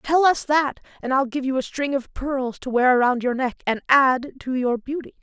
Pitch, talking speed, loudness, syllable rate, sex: 265 Hz, 240 wpm, -21 LUFS, 5.0 syllables/s, female